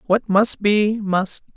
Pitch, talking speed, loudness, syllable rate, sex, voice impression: 205 Hz, 155 wpm, -18 LUFS, 3.2 syllables/s, female, feminine, middle-aged, tensed, powerful, slightly hard, clear, intellectual, elegant, lively, intense